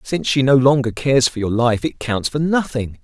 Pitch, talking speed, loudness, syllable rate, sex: 130 Hz, 235 wpm, -17 LUFS, 5.5 syllables/s, male